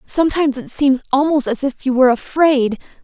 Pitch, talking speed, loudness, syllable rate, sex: 270 Hz, 180 wpm, -16 LUFS, 5.8 syllables/s, female